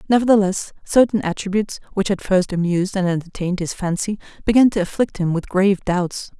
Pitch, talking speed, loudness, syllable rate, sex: 195 Hz, 170 wpm, -19 LUFS, 6.1 syllables/s, female